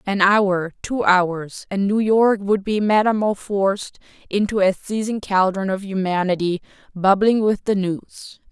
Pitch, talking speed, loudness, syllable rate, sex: 200 Hz, 140 wpm, -19 LUFS, 4.1 syllables/s, female